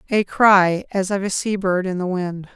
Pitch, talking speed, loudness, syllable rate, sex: 190 Hz, 235 wpm, -19 LUFS, 4.5 syllables/s, female